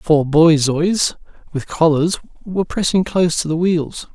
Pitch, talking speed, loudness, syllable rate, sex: 165 Hz, 145 wpm, -17 LUFS, 4.4 syllables/s, male